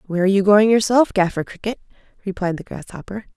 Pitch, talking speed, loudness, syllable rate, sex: 200 Hz, 180 wpm, -18 LUFS, 6.7 syllables/s, female